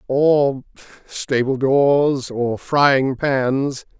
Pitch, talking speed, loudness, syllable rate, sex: 135 Hz, 90 wpm, -18 LUFS, 2.1 syllables/s, male